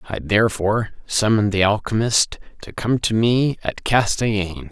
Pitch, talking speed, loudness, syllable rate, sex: 105 Hz, 140 wpm, -19 LUFS, 5.2 syllables/s, male